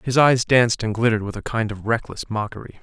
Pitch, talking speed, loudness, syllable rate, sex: 115 Hz, 235 wpm, -21 LUFS, 6.5 syllables/s, male